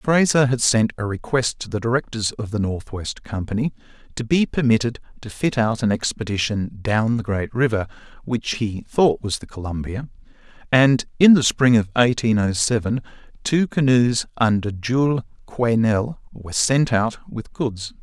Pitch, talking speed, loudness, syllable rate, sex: 115 Hz, 160 wpm, -20 LUFS, 4.5 syllables/s, male